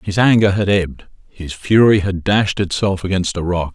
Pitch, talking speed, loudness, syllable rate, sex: 95 Hz, 190 wpm, -16 LUFS, 4.9 syllables/s, male